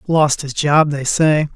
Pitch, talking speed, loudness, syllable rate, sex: 150 Hz, 195 wpm, -16 LUFS, 3.7 syllables/s, male